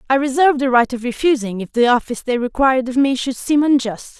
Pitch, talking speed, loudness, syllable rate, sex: 255 Hz, 230 wpm, -17 LUFS, 6.2 syllables/s, female